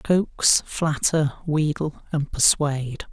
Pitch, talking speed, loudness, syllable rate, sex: 150 Hz, 95 wpm, -22 LUFS, 3.2 syllables/s, male